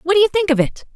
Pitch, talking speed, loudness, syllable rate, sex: 340 Hz, 380 wpm, -17 LUFS, 7.6 syllables/s, female